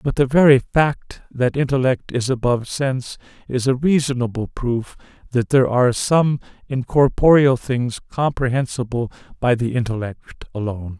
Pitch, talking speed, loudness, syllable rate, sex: 125 Hz, 130 wpm, -19 LUFS, 4.9 syllables/s, male